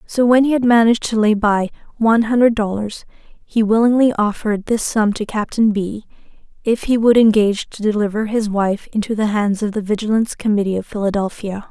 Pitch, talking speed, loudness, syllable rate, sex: 215 Hz, 185 wpm, -17 LUFS, 5.6 syllables/s, female